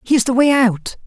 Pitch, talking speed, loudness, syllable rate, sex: 245 Hz, 225 wpm, -15 LUFS, 5.7 syllables/s, female